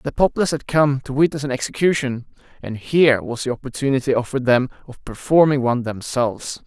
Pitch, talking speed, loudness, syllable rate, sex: 135 Hz, 170 wpm, -19 LUFS, 6.2 syllables/s, male